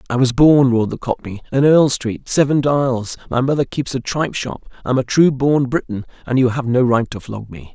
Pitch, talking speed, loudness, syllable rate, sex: 130 Hz, 225 wpm, -17 LUFS, 5.4 syllables/s, male